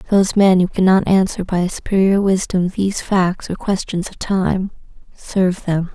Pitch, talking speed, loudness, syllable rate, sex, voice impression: 185 Hz, 170 wpm, -17 LUFS, 4.8 syllables/s, female, feminine, very adult-like, dark, very calm, slightly unique